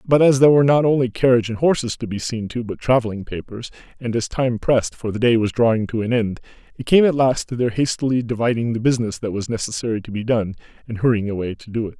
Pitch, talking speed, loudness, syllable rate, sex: 115 Hz, 250 wpm, -19 LUFS, 6.6 syllables/s, male